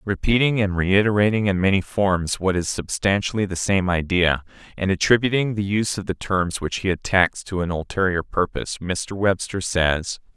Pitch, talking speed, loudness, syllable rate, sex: 95 Hz, 170 wpm, -21 LUFS, 5.0 syllables/s, male